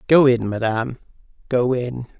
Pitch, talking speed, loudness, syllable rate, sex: 125 Hz, 135 wpm, -20 LUFS, 4.3 syllables/s, male